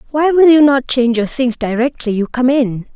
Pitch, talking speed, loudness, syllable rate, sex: 255 Hz, 225 wpm, -13 LUFS, 5.3 syllables/s, female